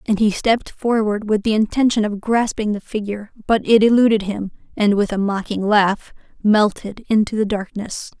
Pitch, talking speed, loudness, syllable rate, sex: 210 Hz, 175 wpm, -18 LUFS, 5.0 syllables/s, female